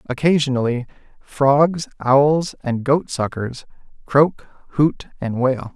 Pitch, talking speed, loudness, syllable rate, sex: 135 Hz, 105 wpm, -19 LUFS, 3.5 syllables/s, male